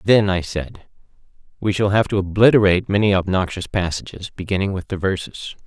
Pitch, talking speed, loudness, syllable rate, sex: 95 Hz, 160 wpm, -19 LUFS, 5.7 syllables/s, male